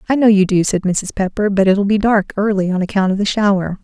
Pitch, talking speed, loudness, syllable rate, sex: 200 Hz, 265 wpm, -15 LUFS, 5.8 syllables/s, female